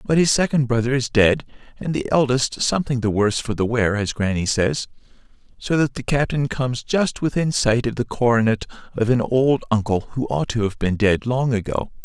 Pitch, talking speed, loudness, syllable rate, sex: 120 Hz, 205 wpm, -20 LUFS, 5.3 syllables/s, male